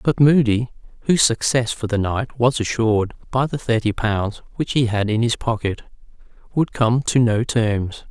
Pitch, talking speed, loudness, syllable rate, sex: 115 Hz, 180 wpm, -20 LUFS, 4.6 syllables/s, male